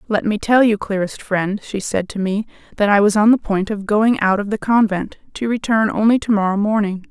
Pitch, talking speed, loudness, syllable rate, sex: 210 Hz, 230 wpm, -17 LUFS, 5.3 syllables/s, female